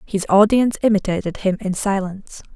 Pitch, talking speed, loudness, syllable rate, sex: 195 Hz, 140 wpm, -18 LUFS, 5.8 syllables/s, female